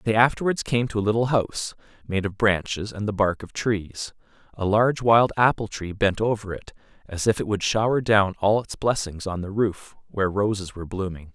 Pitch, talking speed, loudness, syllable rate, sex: 105 Hz, 205 wpm, -23 LUFS, 5.3 syllables/s, male